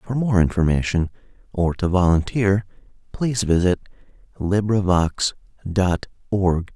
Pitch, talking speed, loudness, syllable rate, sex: 95 Hz, 100 wpm, -21 LUFS, 4.4 syllables/s, male